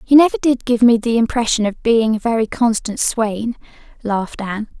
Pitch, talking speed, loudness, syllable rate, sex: 230 Hz, 190 wpm, -17 LUFS, 5.4 syllables/s, female